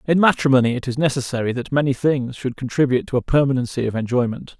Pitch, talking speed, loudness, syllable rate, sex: 130 Hz, 195 wpm, -20 LUFS, 6.7 syllables/s, male